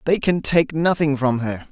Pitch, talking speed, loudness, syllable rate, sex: 150 Hz, 210 wpm, -19 LUFS, 4.5 syllables/s, male